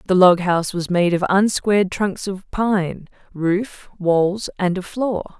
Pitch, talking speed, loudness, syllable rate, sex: 190 Hz, 145 wpm, -19 LUFS, 3.6 syllables/s, female